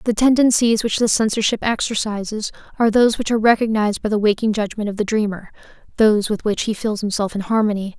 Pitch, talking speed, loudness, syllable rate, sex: 215 Hz, 195 wpm, -18 LUFS, 6.5 syllables/s, female